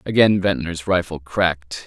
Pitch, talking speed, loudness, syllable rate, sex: 85 Hz, 130 wpm, -20 LUFS, 4.6 syllables/s, male